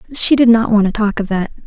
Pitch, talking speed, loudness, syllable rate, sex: 220 Hz, 290 wpm, -14 LUFS, 6.4 syllables/s, female